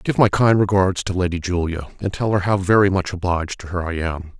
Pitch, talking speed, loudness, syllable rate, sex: 90 Hz, 245 wpm, -20 LUFS, 5.7 syllables/s, male